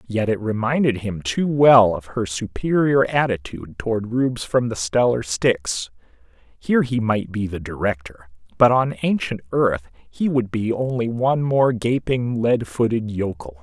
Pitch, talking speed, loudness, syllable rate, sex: 115 Hz, 160 wpm, -20 LUFS, 4.5 syllables/s, male